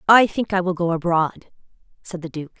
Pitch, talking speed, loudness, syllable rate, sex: 180 Hz, 210 wpm, -21 LUFS, 5.3 syllables/s, female